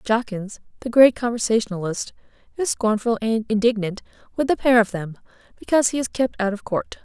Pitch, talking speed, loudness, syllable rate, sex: 225 Hz, 170 wpm, -21 LUFS, 5.6 syllables/s, female